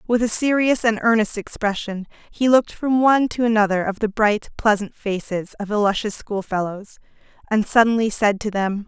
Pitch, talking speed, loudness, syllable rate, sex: 215 Hz, 170 wpm, -20 LUFS, 5.3 syllables/s, female